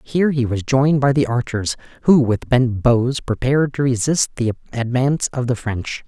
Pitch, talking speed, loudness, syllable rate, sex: 125 Hz, 190 wpm, -18 LUFS, 5.0 syllables/s, male